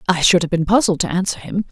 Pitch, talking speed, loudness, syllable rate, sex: 180 Hz, 280 wpm, -17 LUFS, 6.6 syllables/s, female